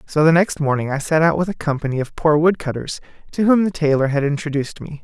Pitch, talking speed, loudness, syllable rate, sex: 155 Hz, 250 wpm, -18 LUFS, 6.3 syllables/s, male